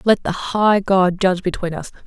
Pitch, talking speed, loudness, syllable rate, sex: 190 Hz, 205 wpm, -18 LUFS, 4.9 syllables/s, female